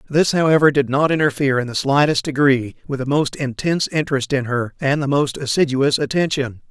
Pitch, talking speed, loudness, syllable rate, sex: 140 Hz, 190 wpm, -18 LUFS, 5.7 syllables/s, male